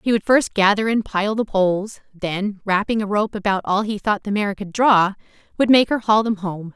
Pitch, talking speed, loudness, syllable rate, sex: 205 Hz, 230 wpm, -19 LUFS, 5.1 syllables/s, female